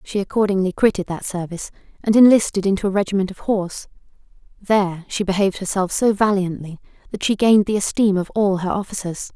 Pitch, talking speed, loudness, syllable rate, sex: 195 Hz, 175 wpm, -19 LUFS, 6.3 syllables/s, female